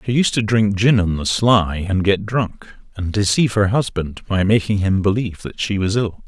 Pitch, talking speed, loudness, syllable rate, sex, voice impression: 100 Hz, 220 wpm, -18 LUFS, 4.9 syllables/s, male, very masculine, very middle-aged, very thick, tensed, very powerful, bright, soft, very clear, fluent, slightly raspy, very cool, intellectual, refreshing, sincere, very calm, very mature, very friendly, reassuring, very unique, elegant, wild, sweet, lively, kind